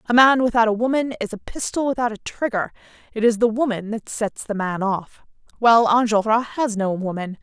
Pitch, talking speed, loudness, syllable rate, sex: 225 Hz, 200 wpm, -20 LUFS, 5.3 syllables/s, female